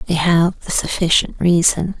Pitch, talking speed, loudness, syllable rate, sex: 170 Hz, 150 wpm, -16 LUFS, 4.4 syllables/s, female